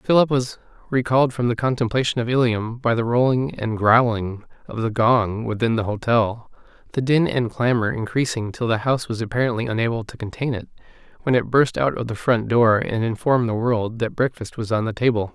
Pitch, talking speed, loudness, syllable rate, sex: 120 Hz, 200 wpm, -21 LUFS, 5.5 syllables/s, male